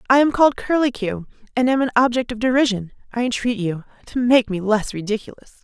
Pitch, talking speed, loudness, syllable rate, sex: 235 Hz, 190 wpm, -20 LUFS, 6.1 syllables/s, female